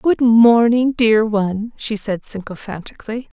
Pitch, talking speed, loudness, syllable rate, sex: 220 Hz, 125 wpm, -16 LUFS, 4.3 syllables/s, female